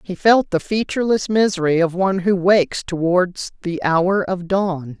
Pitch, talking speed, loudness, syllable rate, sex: 185 Hz, 170 wpm, -18 LUFS, 4.6 syllables/s, female